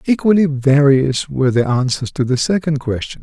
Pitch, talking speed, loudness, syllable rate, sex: 140 Hz, 170 wpm, -15 LUFS, 5.1 syllables/s, male